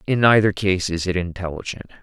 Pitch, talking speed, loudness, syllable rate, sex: 95 Hz, 180 wpm, -20 LUFS, 5.8 syllables/s, male